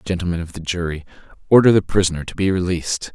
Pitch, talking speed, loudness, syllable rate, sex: 90 Hz, 190 wpm, -19 LUFS, 6.9 syllables/s, male